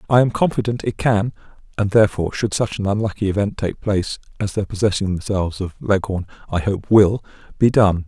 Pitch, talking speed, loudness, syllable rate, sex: 100 Hz, 170 wpm, -19 LUFS, 5.9 syllables/s, male